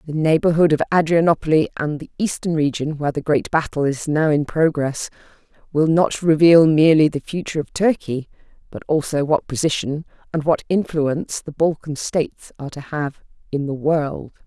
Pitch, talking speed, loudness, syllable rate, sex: 155 Hz, 165 wpm, -19 LUFS, 5.3 syllables/s, female